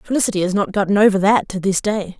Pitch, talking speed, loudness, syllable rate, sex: 200 Hz, 245 wpm, -17 LUFS, 6.5 syllables/s, female